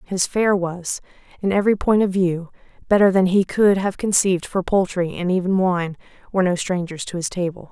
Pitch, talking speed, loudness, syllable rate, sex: 185 Hz, 195 wpm, -20 LUFS, 5.4 syllables/s, female